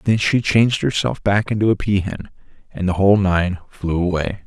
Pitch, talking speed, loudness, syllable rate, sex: 100 Hz, 200 wpm, -18 LUFS, 5.3 syllables/s, male